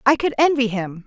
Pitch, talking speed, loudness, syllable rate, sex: 245 Hz, 225 wpm, -19 LUFS, 5.5 syllables/s, female